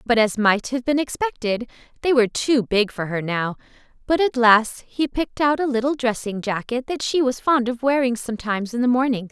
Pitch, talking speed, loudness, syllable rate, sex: 245 Hz, 215 wpm, -21 LUFS, 5.4 syllables/s, female